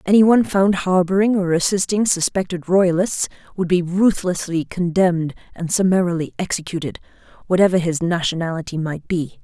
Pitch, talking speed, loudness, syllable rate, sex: 180 Hz, 120 wpm, -19 LUFS, 5.3 syllables/s, female